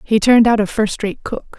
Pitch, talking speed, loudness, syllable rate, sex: 215 Hz, 265 wpm, -15 LUFS, 5.5 syllables/s, female